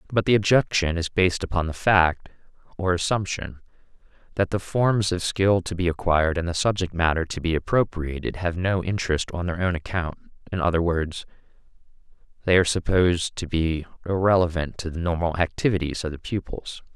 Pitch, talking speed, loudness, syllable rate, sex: 90 Hz, 165 wpm, -24 LUFS, 5.6 syllables/s, male